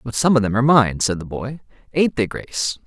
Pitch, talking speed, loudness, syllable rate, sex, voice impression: 120 Hz, 250 wpm, -19 LUFS, 5.9 syllables/s, male, very masculine, very adult-like, slightly middle-aged, thick, very tensed, powerful, very bright, slightly soft, very clear, very fluent, very cool, intellectual, refreshing, sincere, very calm, slightly mature, very friendly, very reassuring, very unique, very elegant, slightly wild, very sweet, very lively, very kind, slightly intense, slightly modest